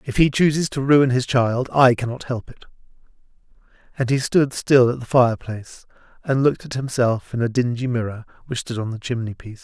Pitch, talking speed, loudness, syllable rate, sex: 125 Hz, 205 wpm, -20 LUFS, 5.5 syllables/s, male